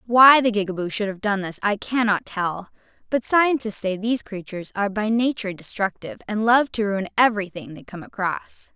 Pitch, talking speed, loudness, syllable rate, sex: 210 Hz, 190 wpm, -22 LUFS, 5.5 syllables/s, female